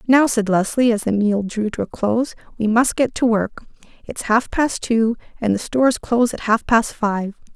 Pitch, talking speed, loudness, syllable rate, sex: 225 Hz, 215 wpm, -19 LUFS, 4.9 syllables/s, female